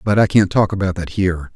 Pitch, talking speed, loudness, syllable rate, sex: 95 Hz, 270 wpm, -17 LUFS, 6.3 syllables/s, male